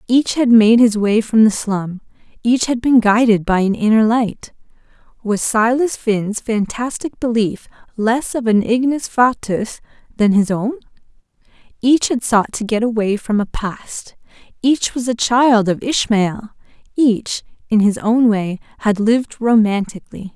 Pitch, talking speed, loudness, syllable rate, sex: 225 Hz, 145 wpm, -16 LUFS, 4.2 syllables/s, female